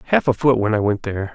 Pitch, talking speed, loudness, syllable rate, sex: 120 Hz, 315 wpm, -19 LUFS, 7.2 syllables/s, male